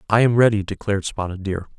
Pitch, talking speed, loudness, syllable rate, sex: 105 Hz, 200 wpm, -20 LUFS, 6.7 syllables/s, male